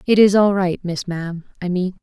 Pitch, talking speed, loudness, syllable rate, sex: 185 Hz, 180 wpm, -18 LUFS, 5.3 syllables/s, female